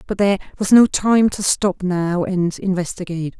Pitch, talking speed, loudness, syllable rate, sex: 190 Hz, 175 wpm, -18 LUFS, 5.0 syllables/s, female